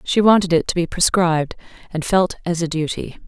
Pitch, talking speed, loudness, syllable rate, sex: 175 Hz, 200 wpm, -18 LUFS, 5.6 syllables/s, female